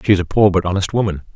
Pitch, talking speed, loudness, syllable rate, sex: 95 Hz, 310 wpm, -16 LUFS, 7.8 syllables/s, male